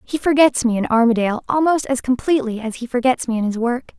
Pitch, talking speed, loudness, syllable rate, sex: 250 Hz, 225 wpm, -18 LUFS, 6.2 syllables/s, female